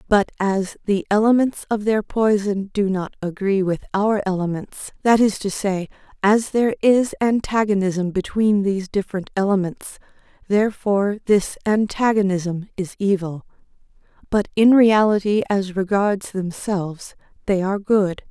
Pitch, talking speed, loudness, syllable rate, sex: 200 Hz, 125 wpm, -20 LUFS, 4.6 syllables/s, female